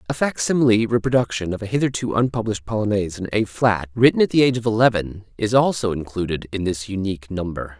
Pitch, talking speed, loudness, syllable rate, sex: 105 Hz, 190 wpm, -20 LUFS, 6.5 syllables/s, male